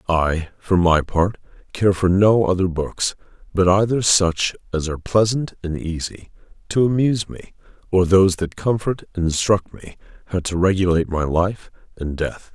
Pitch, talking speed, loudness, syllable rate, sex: 95 Hz, 165 wpm, -19 LUFS, 4.7 syllables/s, male